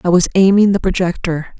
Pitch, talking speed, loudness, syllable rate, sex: 185 Hz, 190 wpm, -14 LUFS, 5.8 syllables/s, female